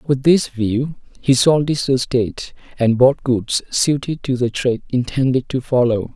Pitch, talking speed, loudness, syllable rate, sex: 130 Hz, 165 wpm, -18 LUFS, 4.3 syllables/s, male